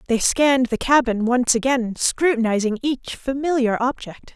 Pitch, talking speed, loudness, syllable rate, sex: 245 Hz, 140 wpm, -20 LUFS, 4.6 syllables/s, female